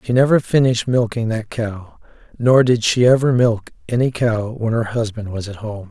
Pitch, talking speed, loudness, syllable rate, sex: 115 Hz, 195 wpm, -18 LUFS, 5.0 syllables/s, male